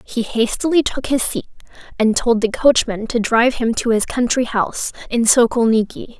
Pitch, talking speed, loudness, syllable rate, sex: 235 Hz, 175 wpm, -17 LUFS, 5.0 syllables/s, female